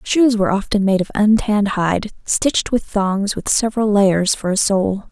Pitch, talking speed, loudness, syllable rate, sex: 205 Hz, 190 wpm, -17 LUFS, 4.8 syllables/s, female